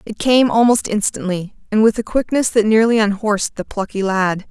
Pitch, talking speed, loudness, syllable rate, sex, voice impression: 215 Hz, 185 wpm, -16 LUFS, 5.2 syllables/s, female, feminine, adult-like, bright, clear, fluent, intellectual, calm, elegant, lively, slightly sharp